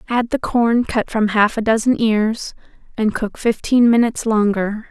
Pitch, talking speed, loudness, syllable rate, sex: 225 Hz, 170 wpm, -17 LUFS, 4.4 syllables/s, female